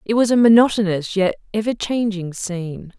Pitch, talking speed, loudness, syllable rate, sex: 205 Hz, 160 wpm, -18 LUFS, 5.2 syllables/s, female